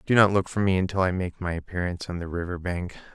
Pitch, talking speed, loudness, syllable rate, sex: 90 Hz, 265 wpm, -26 LUFS, 6.6 syllables/s, male